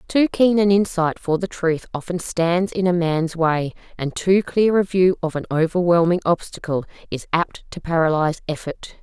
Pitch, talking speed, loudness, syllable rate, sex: 175 Hz, 180 wpm, -20 LUFS, 4.8 syllables/s, female